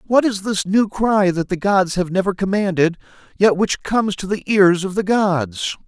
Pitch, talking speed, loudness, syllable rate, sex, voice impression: 190 Hz, 205 wpm, -18 LUFS, 4.6 syllables/s, male, masculine, adult-like, thick, tensed, powerful, slightly hard, clear, intellectual, slightly mature, reassuring, slightly unique, wild, lively, strict